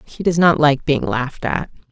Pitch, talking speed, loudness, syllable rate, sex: 150 Hz, 220 wpm, -17 LUFS, 4.9 syllables/s, female